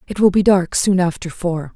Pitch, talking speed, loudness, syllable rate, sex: 180 Hz, 240 wpm, -17 LUFS, 5.0 syllables/s, female